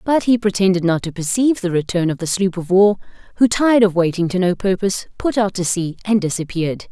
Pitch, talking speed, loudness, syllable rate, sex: 190 Hz, 225 wpm, -17 LUFS, 6.1 syllables/s, female